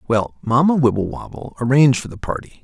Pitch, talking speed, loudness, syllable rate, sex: 120 Hz, 160 wpm, -18 LUFS, 6.2 syllables/s, male